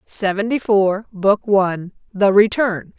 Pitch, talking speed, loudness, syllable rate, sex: 200 Hz, 120 wpm, -17 LUFS, 3.8 syllables/s, female